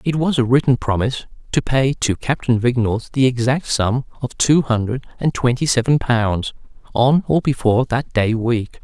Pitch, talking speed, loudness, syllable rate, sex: 125 Hz, 175 wpm, -18 LUFS, 4.9 syllables/s, male